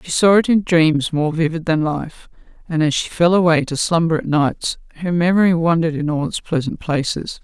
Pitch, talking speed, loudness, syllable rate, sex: 165 Hz, 210 wpm, -17 LUFS, 5.2 syllables/s, female